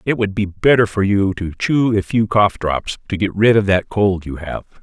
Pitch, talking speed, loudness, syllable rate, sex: 100 Hz, 250 wpm, -17 LUFS, 4.8 syllables/s, male